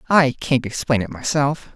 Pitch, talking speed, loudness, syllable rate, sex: 135 Hz, 170 wpm, -20 LUFS, 4.8 syllables/s, male